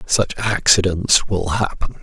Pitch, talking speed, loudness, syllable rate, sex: 95 Hz, 120 wpm, -17 LUFS, 3.8 syllables/s, male